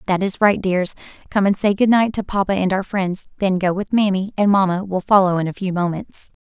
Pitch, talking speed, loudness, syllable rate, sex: 195 Hz, 245 wpm, -19 LUFS, 5.5 syllables/s, female